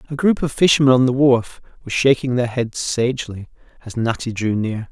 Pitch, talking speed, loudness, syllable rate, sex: 125 Hz, 195 wpm, -18 LUFS, 5.6 syllables/s, male